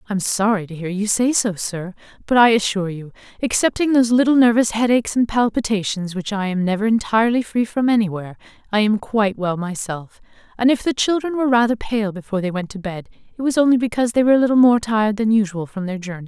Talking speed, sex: 240 wpm, female